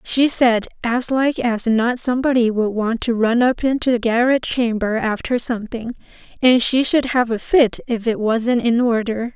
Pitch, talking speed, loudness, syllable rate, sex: 235 Hz, 185 wpm, -18 LUFS, 4.5 syllables/s, female